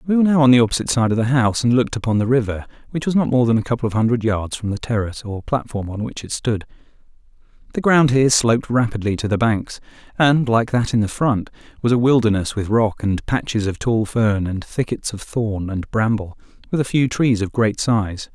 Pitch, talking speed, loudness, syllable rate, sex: 115 Hz, 230 wpm, -19 LUFS, 5.9 syllables/s, male